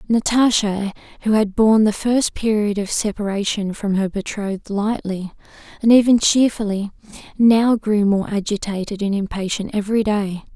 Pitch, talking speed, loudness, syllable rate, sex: 210 Hz, 135 wpm, -19 LUFS, 4.9 syllables/s, female